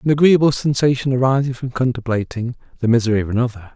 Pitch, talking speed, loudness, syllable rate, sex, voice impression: 125 Hz, 160 wpm, -18 LUFS, 6.8 syllables/s, male, masculine, adult-like, slightly relaxed, weak, soft, raspy, cool, calm, slightly mature, friendly, reassuring, wild, slightly modest